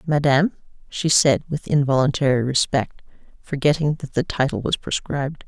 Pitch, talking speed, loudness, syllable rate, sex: 140 Hz, 130 wpm, -20 LUFS, 5.2 syllables/s, female